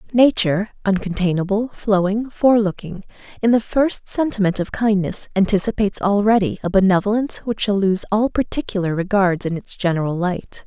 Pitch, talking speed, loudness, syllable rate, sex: 200 Hz, 135 wpm, -19 LUFS, 5.5 syllables/s, female